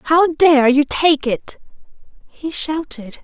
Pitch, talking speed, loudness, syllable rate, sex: 295 Hz, 130 wpm, -16 LUFS, 3.2 syllables/s, female